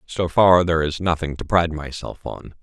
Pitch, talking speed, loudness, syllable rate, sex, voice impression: 80 Hz, 205 wpm, -20 LUFS, 5.3 syllables/s, male, masculine, middle-aged, thick, tensed, slightly hard, slightly halting, slightly cool, calm, mature, slightly friendly, wild, lively, slightly strict